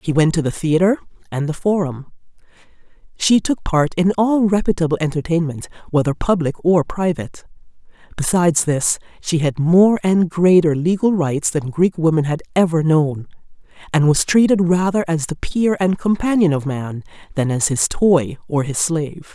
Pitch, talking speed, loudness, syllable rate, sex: 165 Hz, 160 wpm, -17 LUFS, 4.9 syllables/s, female